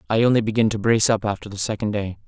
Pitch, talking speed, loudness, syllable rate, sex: 105 Hz, 265 wpm, -21 LUFS, 7.5 syllables/s, male